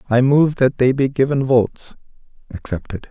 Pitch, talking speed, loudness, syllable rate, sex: 130 Hz, 155 wpm, -17 LUFS, 5.0 syllables/s, male